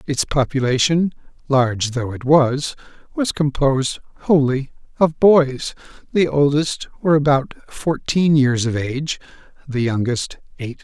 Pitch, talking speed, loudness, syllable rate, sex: 140 Hz, 120 wpm, -18 LUFS, 4.2 syllables/s, male